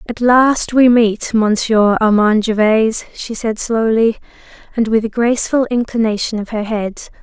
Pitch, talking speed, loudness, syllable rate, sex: 225 Hz, 150 wpm, -14 LUFS, 4.6 syllables/s, female